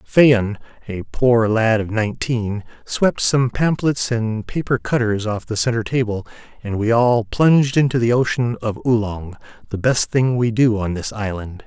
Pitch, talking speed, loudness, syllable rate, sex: 115 Hz, 165 wpm, -18 LUFS, 4.4 syllables/s, male